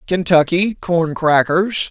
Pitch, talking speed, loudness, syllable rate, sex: 170 Hz, 95 wpm, -16 LUFS, 3.4 syllables/s, male